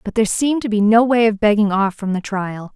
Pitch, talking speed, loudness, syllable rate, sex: 215 Hz, 285 wpm, -17 LUFS, 6.1 syllables/s, female